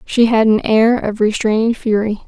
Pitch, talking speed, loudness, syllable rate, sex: 220 Hz, 185 wpm, -14 LUFS, 4.7 syllables/s, female